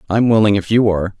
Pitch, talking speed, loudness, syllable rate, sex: 105 Hz, 250 wpm, -14 LUFS, 7.1 syllables/s, male